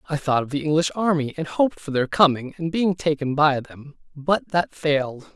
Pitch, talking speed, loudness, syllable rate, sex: 155 Hz, 215 wpm, -22 LUFS, 5.2 syllables/s, male